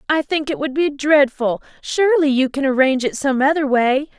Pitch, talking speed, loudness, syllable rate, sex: 280 Hz, 200 wpm, -17 LUFS, 5.3 syllables/s, female